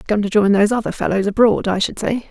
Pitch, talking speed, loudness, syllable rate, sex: 210 Hz, 260 wpm, -17 LUFS, 6.7 syllables/s, female